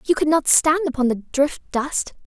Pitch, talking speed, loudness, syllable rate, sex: 290 Hz, 210 wpm, -19 LUFS, 4.8 syllables/s, female